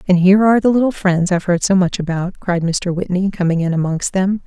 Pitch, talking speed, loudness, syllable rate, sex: 185 Hz, 240 wpm, -16 LUFS, 6.1 syllables/s, female